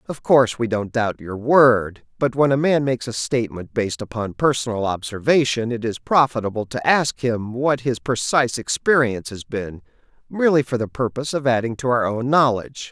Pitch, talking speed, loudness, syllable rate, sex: 125 Hz, 185 wpm, -20 LUFS, 5.4 syllables/s, male